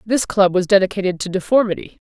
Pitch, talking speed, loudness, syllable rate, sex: 195 Hz, 170 wpm, -17 LUFS, 6.4 syllables/s, female